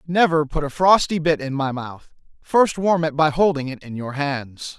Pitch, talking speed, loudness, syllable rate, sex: 150 Hz, 215 wpm, -20 LUFS, 4.6 syllables/s, male